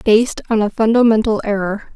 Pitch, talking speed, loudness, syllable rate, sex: 215 Hz, 155 wpm, -16 LUFS, 5.8 syllables/s, female